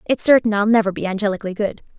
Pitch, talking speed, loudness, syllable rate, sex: 210 Hz, 210 wpm, -18 LUFS, 7.5 syllables/s, female